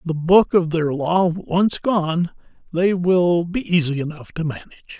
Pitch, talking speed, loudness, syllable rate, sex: 170 Hz, 170 wpm, -19 LUFS, 4.3 syllables/s, male